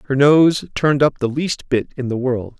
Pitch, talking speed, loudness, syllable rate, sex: 135 Hz, 230 wpm, -17 LUFS, 5.0 syllables/s, male